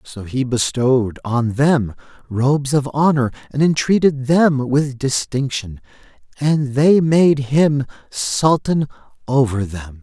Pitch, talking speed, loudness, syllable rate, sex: 135 Hz, 120 wpm, -17 LUFS, 3.7 syllables/s, male